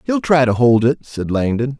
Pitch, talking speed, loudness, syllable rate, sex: 130 Hz, 235 wpm, -16 LUFS, 4.8 syllables/s, male